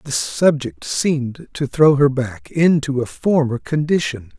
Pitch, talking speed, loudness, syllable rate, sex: 140 Hz, 150 wpm, -18 LUFS, 4.1 syllables/s, male